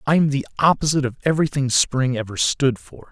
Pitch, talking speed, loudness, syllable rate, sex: 130 Hz, 175 wpm, -20 LUFS, 5.8 syllables/s, male